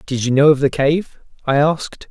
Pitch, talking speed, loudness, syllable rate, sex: 145 Hz, 230 wpm, -16 LUFS, 5.1 syllables/s, male